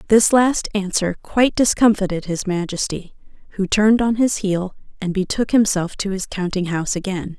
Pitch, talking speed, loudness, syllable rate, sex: 195 Hz, 160 wpm, -19 LUFS, 5.2 syllables/s, female